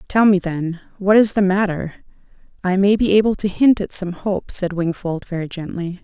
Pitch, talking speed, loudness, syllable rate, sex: 190 Hz, 200 wpm, -18 LUFS, 5.0 syllables/s, female